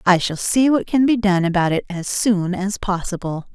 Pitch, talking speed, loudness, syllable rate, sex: 195 Hz, 220 wpm, -19 LUFS, 4.8 syllables/s, female